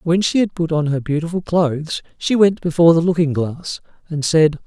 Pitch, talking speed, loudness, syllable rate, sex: 165 Hz, 205 wpm, -17 LUFS, 5.4 syllables/s, male